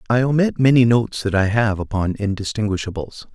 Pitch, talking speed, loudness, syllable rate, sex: 110 Hz, 160 wpm, -19 LUFS, 5.8 syllables/s, male